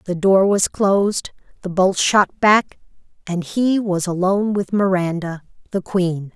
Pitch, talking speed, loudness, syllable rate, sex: 190 Hz, 140 wpm, -18 LUFS, 4.1 syllables/s, female